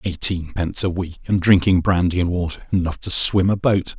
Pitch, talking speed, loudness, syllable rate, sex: 90 Hz, 180 wpm, -19 LUFS, 5.5 syllables/s, male